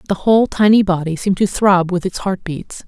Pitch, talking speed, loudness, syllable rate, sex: 190 Hz, 230 wpm, -15 LUFS, 5.6 syllables/s, female